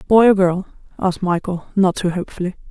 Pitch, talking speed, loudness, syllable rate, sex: 185 Hz, 175 wpm, -18 LUFS, 6.4 syllables/s, female